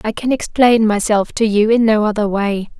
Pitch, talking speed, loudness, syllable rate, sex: 215 Hz, 215 wpm, -15 LUFS, 4.9 syllables/s, female